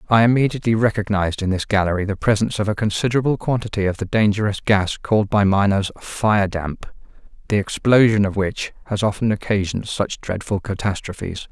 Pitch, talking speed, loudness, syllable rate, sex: 105 Hz, 155 wpm, -20 LUFS, 6.1 syllables/s, male